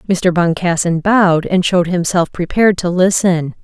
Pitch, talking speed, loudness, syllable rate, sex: 180 Hz, 150 wpm, -14 LUFS, 5.0 syllables/s, female